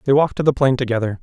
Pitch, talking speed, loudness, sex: 130 Hz, 295 wpm, -18 LUFS, male